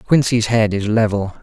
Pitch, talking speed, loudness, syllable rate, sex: 110 Hz, 170 wpm, -17 LUFS, 4.7 syllables/s, male